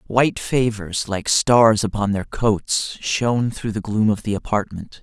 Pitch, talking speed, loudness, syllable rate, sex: 110 Hz, 165 wpm, -20 LUFS, 4.2 syllables/s, male